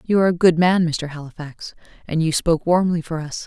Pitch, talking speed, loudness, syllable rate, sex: 165 Hz, 225 wpm, -19 LUFS, 5.9 syllables/s, female